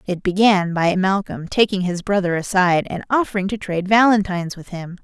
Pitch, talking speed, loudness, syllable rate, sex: 190 Hz, 180 wpm, -18 LUFS, 5.7 syllables/s, female